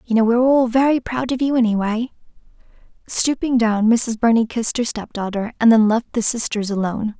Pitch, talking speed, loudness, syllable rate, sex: 230 Hz, 185 wpm, -18 LUFS, 5.7 syllables/s, female